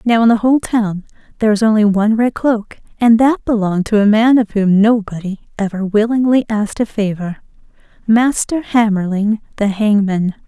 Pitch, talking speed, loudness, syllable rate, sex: 215 Hz, 160 wpm, -14 LUFS, 5.3 syllables/s, female